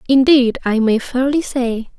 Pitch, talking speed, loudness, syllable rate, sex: 250 Hz, 150 wpm, -15 LUFS, 4.1 syllables/s, female